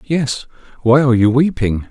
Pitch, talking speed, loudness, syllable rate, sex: 130 Hz, 155 wpm, -15 LUFS, 4.8 syllables/s, male